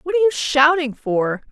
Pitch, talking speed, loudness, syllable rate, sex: 295 Hz, 200 wpm, -18 LUFS, 5.3 syllables/s, female